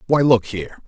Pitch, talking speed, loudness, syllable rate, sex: 115 Hz, 205 wpm, -17 LUFS, 5.9 syllables/s, male